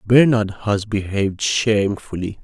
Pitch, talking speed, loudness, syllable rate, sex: 105 Hz, 100 wpm, -19 LUFS, 4.4 syllables/s, male